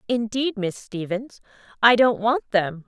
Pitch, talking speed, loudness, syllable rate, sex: 215 Hz, 145 wpm, -22 LUFS, 4.1 syllables/s, female